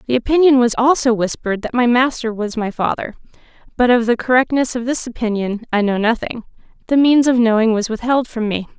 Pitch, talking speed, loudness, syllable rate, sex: 235 Hz, 200 wpm, -16 LUFS, 5.8 syllables/s, female